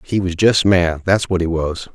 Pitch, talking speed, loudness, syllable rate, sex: 90 Hz, 245 wpm, -17 LUFS, 4.5 syllables/s, male